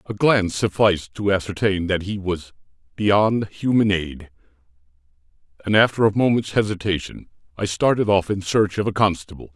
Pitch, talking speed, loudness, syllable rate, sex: 100 Hz, 150 wpm, -20 LUFS, 5.2 syllables/s, male